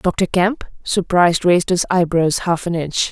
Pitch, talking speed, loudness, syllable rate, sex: 175 Hz, 175 wpm, -17 LUFS, 4.5 syllables/s, female